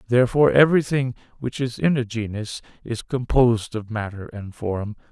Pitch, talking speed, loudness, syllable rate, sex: 120 Hz, 150 wpm, -22 LUFS, 5.4 syllables/s, male